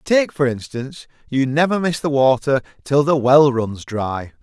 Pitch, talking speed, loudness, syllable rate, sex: 140 Hz, 175 wpm, -18 LUFS, 4.5 syllables/s, male